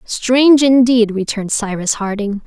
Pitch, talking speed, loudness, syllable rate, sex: 225 Hz, 120 wpm, -14 LUFS, 4.7 syllables/s, female